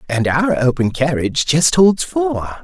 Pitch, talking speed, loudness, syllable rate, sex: 155 Hz, 160 wpm, -16 LUFS, 4.3 syllables/s, male